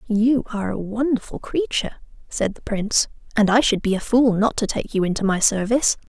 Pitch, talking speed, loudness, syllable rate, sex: 220 Hz, 205 wpm, -21 LUFS, 5.7 syllables/s, female